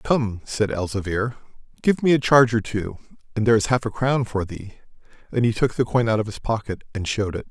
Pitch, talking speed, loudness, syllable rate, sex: 110 Hz, 230 wpm, -22 LUFS, 5.9 syllables/s, male